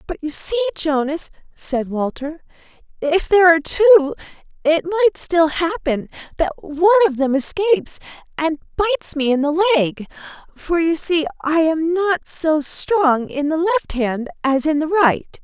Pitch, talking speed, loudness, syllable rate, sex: 325 Hz, 160 wpm, -18 LUFS, 4.8 syllables/s, female